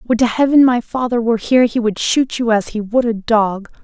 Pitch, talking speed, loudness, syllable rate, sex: 230 Hz, 250 wpm, -15 LUFS, 5.5 syllables/s, female